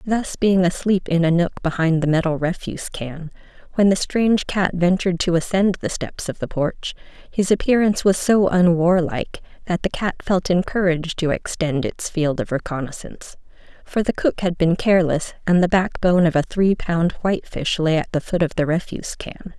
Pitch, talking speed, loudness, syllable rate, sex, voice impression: 175 Hz, 185 wpm, -20 LUFS, 5.3 syllables/s, female, feminine, adult-like, tensed, slightly hard, clear, fluent, intellectual, calm, elegant, lively, slightly sharp